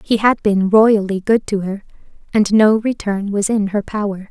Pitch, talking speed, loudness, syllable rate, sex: 205 Hz, 195 wpm, -16 LUFS, 4.6 syllables/s, female